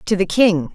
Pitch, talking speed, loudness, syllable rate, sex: 190 Hz, 245 wpm, -16 LUFS, 4.6 syllables/s, female